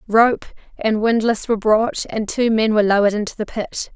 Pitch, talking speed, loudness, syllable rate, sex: 215 Hz, 195 wpm, -18 LUFS, 5.4 syllables/s, female